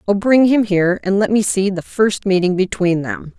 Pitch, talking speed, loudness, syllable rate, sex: 200 Hz, 230 wpm, -16 LUFS, 5.0 syllables/s, female